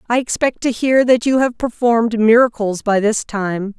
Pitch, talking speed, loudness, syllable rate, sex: 230 Hz, 190 wpm, -16 LUFS, 4.7 syllables/s, female